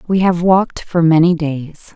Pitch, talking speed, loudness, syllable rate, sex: 170 Hz, 185 wpm, -14 LUFS, 4.5 syllables/s, female